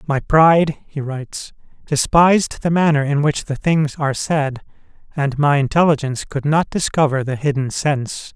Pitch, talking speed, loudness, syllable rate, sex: 145 Hz, 160 wpm, -17 LUFS, 4.9 syllables/s, male